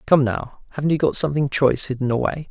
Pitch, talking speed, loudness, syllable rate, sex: 140 Hz, 215 wpm, -20 LUFS, 6.6 syllables/s, male